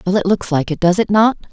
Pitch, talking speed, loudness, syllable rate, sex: 195 Hz, 315 wpm, -15 LUFS, 6.4 syllables/s, female